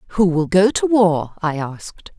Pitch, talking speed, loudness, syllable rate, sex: 180 Hz, 190 wpm, -17 LUFS, 4.5 syllables/s, female